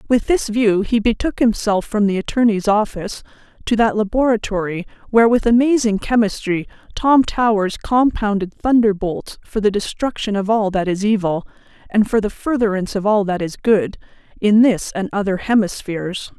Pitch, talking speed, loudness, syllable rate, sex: 210 Hz, 155 wpm, -18 LUFS, 5.1 syllables/s, female